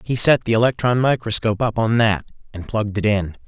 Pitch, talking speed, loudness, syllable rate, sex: 110 Hz, 205 wpm, -19 LUFS, 6.0 syllables/s, male